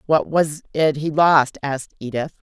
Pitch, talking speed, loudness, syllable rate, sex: 150 Hz, 165 wpm, -20 LUFS, 4.6 syllables/s, female